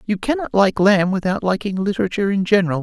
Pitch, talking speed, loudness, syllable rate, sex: 195 Hz, 190 wpm, -18 LUFS, 6.5 syllables/s, male